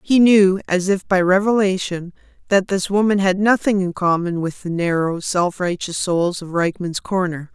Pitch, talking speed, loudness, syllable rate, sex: 185 Hz, 175 wpm, -18 LUFS, 4.6 syllables/s, female